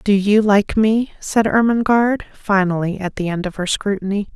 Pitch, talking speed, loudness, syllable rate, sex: 205 Hz, 180 wpm, -17 LUFS, 4.8 syllables/s, female